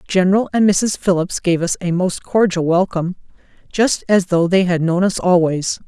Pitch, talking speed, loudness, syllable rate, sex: 185 Hz, 175 wpm, -16 LUFS, 5.0 syllables/s, female